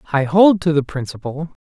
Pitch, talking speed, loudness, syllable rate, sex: 155 Hz, 185 wpm, -16 LUFS, 5.4 syllables/s, male